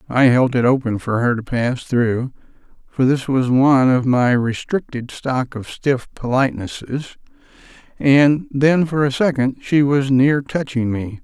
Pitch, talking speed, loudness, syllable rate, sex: 130 Hz, 160 wpm, -18 LUFS, 4.3 syllables/s, male